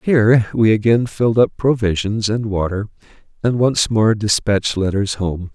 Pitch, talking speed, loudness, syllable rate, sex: 110 Hz, 150 wpm, -17 LUFS, 4.8 syllables/s, male